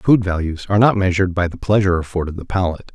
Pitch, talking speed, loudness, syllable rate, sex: 95 Hz, 225 wpm, -18 LUFS, 7.3 syllables/s, male